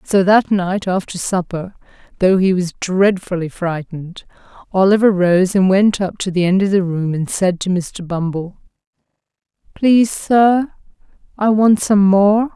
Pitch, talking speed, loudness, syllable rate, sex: 190 Hz, 155 wpm, -16 LUFS, 4.3 syllables/s, female